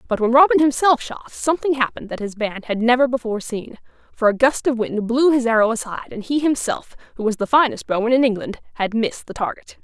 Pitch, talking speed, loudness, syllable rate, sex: 245 Hz, 225 wpm, -19 LUFS, 6.2 syllables/s, female